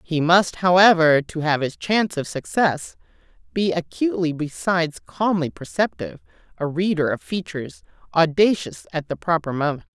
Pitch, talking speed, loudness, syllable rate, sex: 170 Hz, 140 wpm, -21 LUFS, 5.1 syllables/s, female